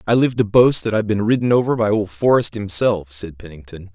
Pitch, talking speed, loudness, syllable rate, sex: 105 Hz, 230 wpm, -17 LUFS, 5.8 syllables/s, male